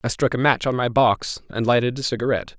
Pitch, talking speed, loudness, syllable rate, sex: 120 Hz, 255 wpm, -21 LUFS, 6.3 syllables/s, male